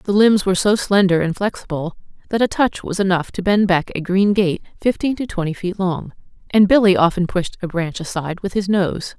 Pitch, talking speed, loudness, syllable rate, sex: 190 Hz, 215 wpm, -18 LUFS, 5.4 syllables/s, female